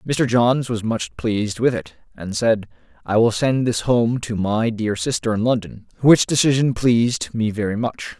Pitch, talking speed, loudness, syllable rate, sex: 115 Hz, 190 wpm, -19 LUFS, 4.6 syllables/s, male